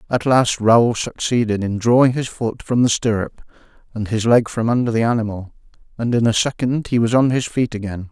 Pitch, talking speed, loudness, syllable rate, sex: 115 Hz, 205 wpm, -18 LUFS, 5.4 syllables/s, male